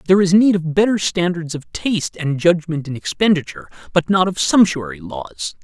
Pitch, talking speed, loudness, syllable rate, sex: 165 Hz, 180 wpm, -17 LUFS, 5.5 syllables/s, male